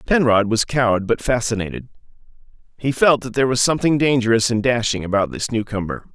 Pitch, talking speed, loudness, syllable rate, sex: 120 Hz, 165 wpm, -19 LUFS, 6.2 syllables/s, male